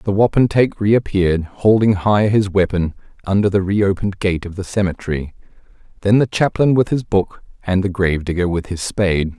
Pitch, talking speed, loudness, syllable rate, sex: 100 Hz, 165 wpm, -17 LUFS, 5.4 syllables/s, male